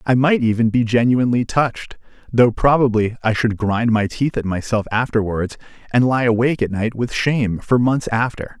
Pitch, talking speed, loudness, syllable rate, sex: 115 Hz, 180 wpm, -18 LUFS, 5.2 syllables/s, male